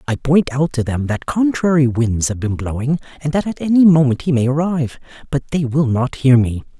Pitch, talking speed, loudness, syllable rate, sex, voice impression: 140 Hz, 220 wpm, -17 LUFS, 5.4 syllables/s, male, very masculine, adult-like, slightly thick, slightly tensed, slightly powerful, bright, soft, slightly muffled, fluent, slightly cool, intellectual, refreshing, sincere, very calm, friendly, reassuring, slightly unique, elegant, sweet, lively, kind, slightly modest